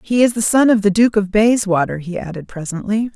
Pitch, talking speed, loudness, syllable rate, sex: 205 Hz, 230 wpm, -16 LUFS, 5.6 syllables/s, female